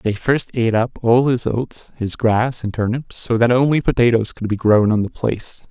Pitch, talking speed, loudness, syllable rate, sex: 115 Hz, 220 wpm, -18 LUFS, 4.8 syllables/s, male